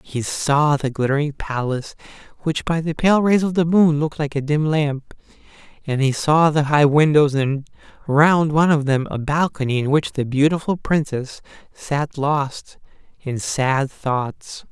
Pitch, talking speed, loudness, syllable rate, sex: 145 Hz, 165 wpm, -19 LUFS, 4.3 syllables/s, male